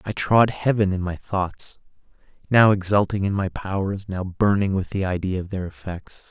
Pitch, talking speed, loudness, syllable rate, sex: 95 Hz, 180 wpm, -22 LUFS, 4.7 syllables/s, male